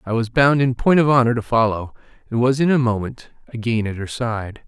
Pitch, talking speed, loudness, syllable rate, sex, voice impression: 120 Hz, 230 wpm, -19 LUFS, 5.4 syllables/s, male, masculine, adult-like, tensed, powerful, slightly bright, clear, intellectual, mature, friendly, slightly reassuring, wild, lively, slightly kind